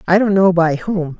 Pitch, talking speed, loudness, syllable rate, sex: 180 Hz, 250 wpm, -15 LUFS, 4.8 syllables/s, male